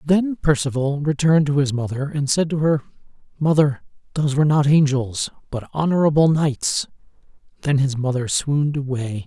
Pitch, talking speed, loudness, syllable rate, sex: 145 Hz, 150 wpm, -20 LUFS, 5.2 syllables/s, male